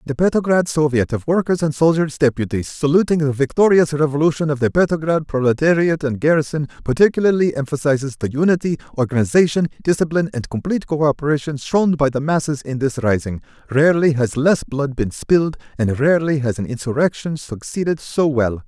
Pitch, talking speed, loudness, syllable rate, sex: 145 Hz, 155 wpm, -18 LUFS, 5.8 syllables/s, male